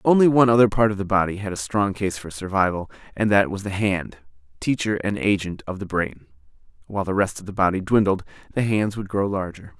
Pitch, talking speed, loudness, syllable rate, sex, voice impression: 100 Hz, 220 wpm, -22 LUFS, 5.9 syllables/s, male, very masculine, adult-like, slightly thick, slightly fluent, cool, slightly wild